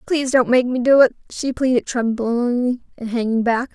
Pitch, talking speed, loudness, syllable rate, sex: 245 Hz, 190 wpm, -18 LUFS, 5.2 syllables/s, female